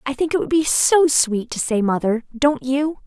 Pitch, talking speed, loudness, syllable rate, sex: 270 Hz, 235 wpm, -18 LUFS, 4.6 syllables/s, female